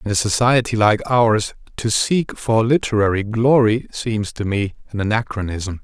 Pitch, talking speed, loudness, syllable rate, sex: 110 Hz, 155 wpm, -18 LUFS, 4.5 syllables/s, male